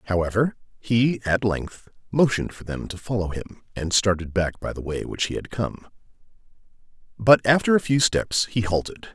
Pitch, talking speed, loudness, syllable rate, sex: 110 Hz, 175 wpm, -23 LUFS, 5.1 syllables/s, male